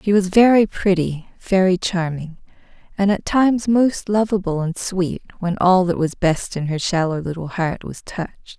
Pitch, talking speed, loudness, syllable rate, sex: 185 Hz, 175 wpm, -19 LUFS, 4.7 syllables/s, female